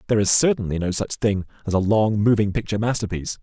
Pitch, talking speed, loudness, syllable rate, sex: 105 Hz, 210 wpm, -21 LUFS, 7.0 syllables/s, male